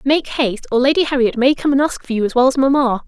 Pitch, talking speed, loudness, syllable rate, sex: 265 Hz, 295 wpm, -16 LUFS, 6.5 syllables/s, female